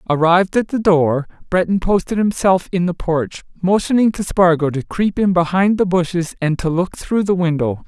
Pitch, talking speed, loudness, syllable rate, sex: 180 Hz, 190 wpm, -17 LUFS, 5.1 syllables/s, male